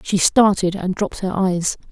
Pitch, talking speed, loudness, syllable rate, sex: 190 Hz, 190 wpm, -18 LUFS, 4.8 syllables/s, female